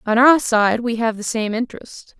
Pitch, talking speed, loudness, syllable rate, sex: 230 Hz, 220 wpm, -18 LUFS, 4.8 syllables/s, female